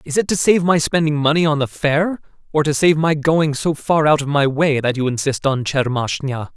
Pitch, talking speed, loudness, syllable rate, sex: 150 Hz, 240 wpm, -17 LUFS, 5.1 syllables/s, male